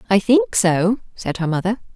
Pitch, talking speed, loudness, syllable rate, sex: 205 Hz, 185 wpm, -19 LUFS, 4.6 syllables/s, female